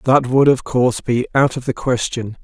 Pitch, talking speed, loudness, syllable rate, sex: 125 Hz, 220 wpm, -17 LUFS, 5.0 syllables/s, male